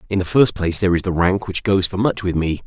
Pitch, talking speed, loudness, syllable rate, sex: 95 Hz, 315 wpm, -18 LUFS, 6.5 syllables/s, male